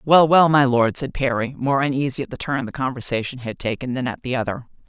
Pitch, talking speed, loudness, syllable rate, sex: 130 Hz, 235 wpm, -20 LUFS, 5.8 syllables/s, female